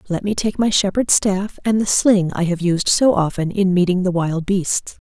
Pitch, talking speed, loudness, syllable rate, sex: 190 Hz, 225 wpm, -18 LUFS, 4.7 syllables/s, female